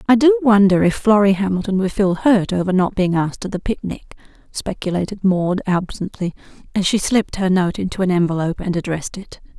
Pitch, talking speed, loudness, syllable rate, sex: 195 Hz, 190 wpm, -18 LUFS, 5.9 syllables/s, female